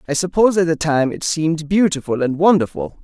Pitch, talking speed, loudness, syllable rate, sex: 160 Hz, 200 wpm, -17 LUFS, 6.0 syllables/s, male